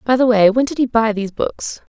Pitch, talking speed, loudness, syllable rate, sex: 230 Hz, 275 wpm, -17 LUFS, 5.7 syllables/s, female